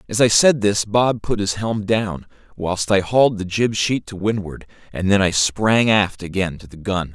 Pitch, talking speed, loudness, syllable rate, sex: 100 Hz, 220 wpm, -19 LUFS, 4.5 syllables/s, male